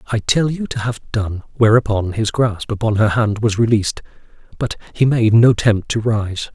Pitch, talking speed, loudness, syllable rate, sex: 110 Hz, 195 wpm, -17 LUFS, 5.0 syllables/s, male